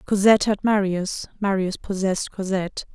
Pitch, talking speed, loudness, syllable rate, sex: 195 Hz, 120 wpm, -22 LUFS, 5.5 syllables/s, female